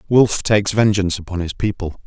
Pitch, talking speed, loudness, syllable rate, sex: 100 Hz, 175 wpm, -18 LUFS, 6.0 syllables/s, male